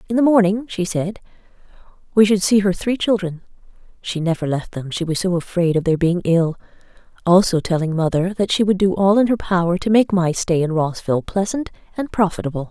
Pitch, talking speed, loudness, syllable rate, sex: 185 Hz, 205 wpm, -18 LUFS, 5.6 syllables/s, female